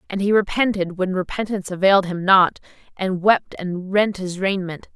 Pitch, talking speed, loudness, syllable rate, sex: 190 Hz, 170 wpm, -20 LUFS, 5.0 syllables/s, female